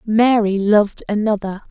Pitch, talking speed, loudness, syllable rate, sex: 210 Hz, 105 wpm, -17 LUFS, 4.6 syllables/s, female